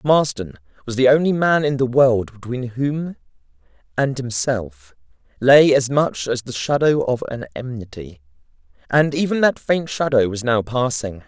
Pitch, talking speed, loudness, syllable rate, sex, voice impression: 125 Hz, 155 wpm, -19 LUFS, 4.4 syllables/s, male, masculine, adult-like, slightly thick, cool, slightly intellectual, slightly kind